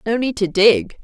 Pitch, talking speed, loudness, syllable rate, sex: 215 Hz, 235 wpm, -16 LUFS, 4.4 syllables/s, female